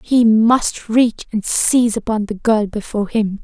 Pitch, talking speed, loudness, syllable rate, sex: 220 Hz, 175 wpm, -16 LUFS, 4.4 syllables/s, female